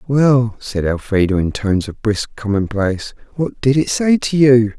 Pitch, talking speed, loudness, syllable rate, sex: 115 Hz, 175 wpm, -16 LUFS, 4.6 syllables/s, male